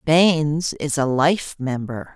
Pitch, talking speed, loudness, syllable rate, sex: 150 Hz, 140 wpm, -20 LUFS, 3.5 syllables/s, female